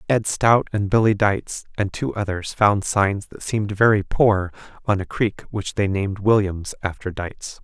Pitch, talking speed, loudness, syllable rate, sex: 100 Hz, 180 wpm, -21 LUFS, 4.4 syllables/s, male